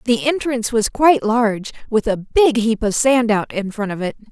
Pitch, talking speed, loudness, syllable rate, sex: 230 Hz, 225 wpm, -17 LUFS, 5.2 syllables/s, female